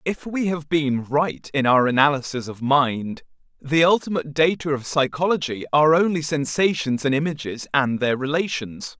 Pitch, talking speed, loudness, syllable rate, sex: 145 Hz, 155 wpm, -21 LUFS, 4.9 syllables/s, male